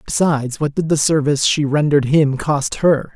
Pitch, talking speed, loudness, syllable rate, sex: 145 Hz, 190 wpm, -16 LUFS, 5.3 syllables/s, male